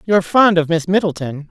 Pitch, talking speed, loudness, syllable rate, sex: 175 Hz, 200 wpm, -15 LUFS, 5.8 syllables/s, female